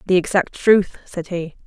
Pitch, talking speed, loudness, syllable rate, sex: 180 Hz, 180 wpm, -19 LUFS, 4.4 syllables/s, female